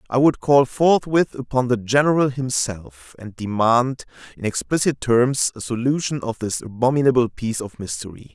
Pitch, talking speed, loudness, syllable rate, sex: 125 Hz, 150 wpm, -20 LUFS, 4.9 syllables/s, male